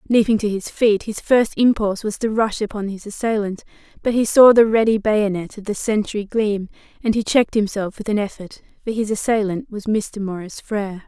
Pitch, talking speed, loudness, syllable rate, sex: 210 Hz, 200 wpm, -19 LUFS, 5.5 syllables/s, female